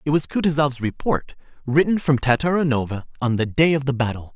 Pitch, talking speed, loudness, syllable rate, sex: 140 Hz, 180 wpm, -21 LUFS, 5.8 syllables/s, male